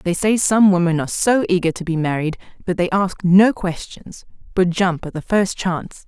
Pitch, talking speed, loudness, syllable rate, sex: 180 Hz, 205 wpm, -18 LUFS, 5.0 syllables/s, female